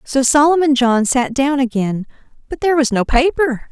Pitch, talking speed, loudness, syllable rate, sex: 265 Hz, 180 wpm, -15 LUFS, 5.0 syllables/s, female